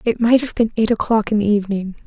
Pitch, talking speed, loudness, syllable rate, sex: 215 Hz, 260 wpm, -18 LUFS, 6.5 syllables/s, female